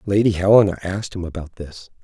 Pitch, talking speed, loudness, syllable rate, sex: 95 Hz, 175 wpm, -18 LUFS, 6.2 syllables/s, male